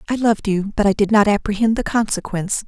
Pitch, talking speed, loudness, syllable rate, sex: 210 Hz, 225 wpm, -18 LUFS, 6.5 syllables/s, female